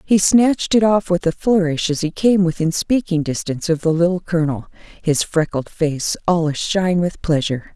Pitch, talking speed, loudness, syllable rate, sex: 170 Hz, 185 wpm, -18 LUFS, 5.3 syllables/s, female